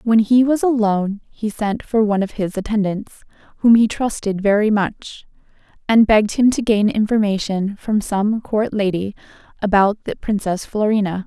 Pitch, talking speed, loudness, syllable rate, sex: 210 Hz, 160 wpm, -18 LUFS, 4.8 syllables/s, female